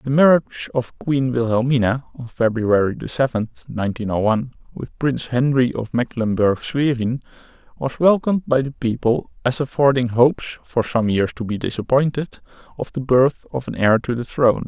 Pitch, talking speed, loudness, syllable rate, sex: 125 Hz, 165 wpm, -20 LUFS, 5.1 syllables/s, male